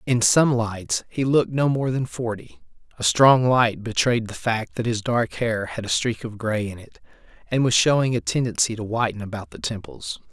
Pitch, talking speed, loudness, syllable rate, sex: 115 Hz, 210 wpm, -22 LUFS, 4.9 syllables/s, male